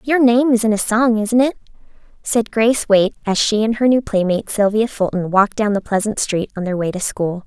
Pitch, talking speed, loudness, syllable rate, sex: 215 Hz, 235 wpm, -17 LUFS, 5.7 syllables/s, female